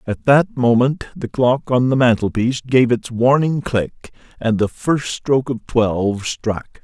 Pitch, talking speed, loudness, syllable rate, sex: 120 Hz, 165 wpm, -17 LUFS, 4.1 syllables/s, male